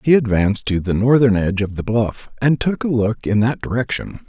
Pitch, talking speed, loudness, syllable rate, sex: 115 Hz, 225 wpm, -18 LUFS, 5.5 syllables/s, male